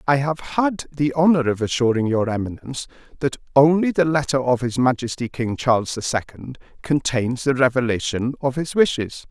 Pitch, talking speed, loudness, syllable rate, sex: 135 Hz, 170 wpm, -20 LUFS, 5.2 syllables/s, male